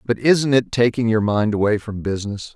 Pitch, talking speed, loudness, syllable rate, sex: 110 Hz, 210 wpm, -19 LUFS, 5.3 syllables/s, male